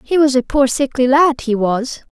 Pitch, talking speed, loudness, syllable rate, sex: 265 Hz, 225 wpm, -15 LUFS, 4.7 syllables/s, female